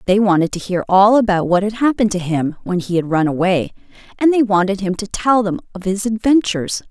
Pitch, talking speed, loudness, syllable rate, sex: 200 Hz, 225 wpm, -16 LUFS, 5.9 syllables/s, female